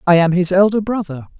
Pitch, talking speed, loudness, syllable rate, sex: 185 Hz, 215 wpm, -15 LUFS, 6.1 syllables/s, female